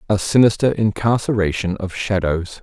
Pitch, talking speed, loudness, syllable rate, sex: 100 Hz, 115 wpm, -18 LUFS, 4.9 syllables/s, male